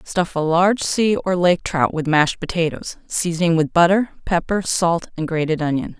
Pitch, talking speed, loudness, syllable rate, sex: 170 Hz, 180 wpm, -19 LUFS, 4.8 syllables/s, female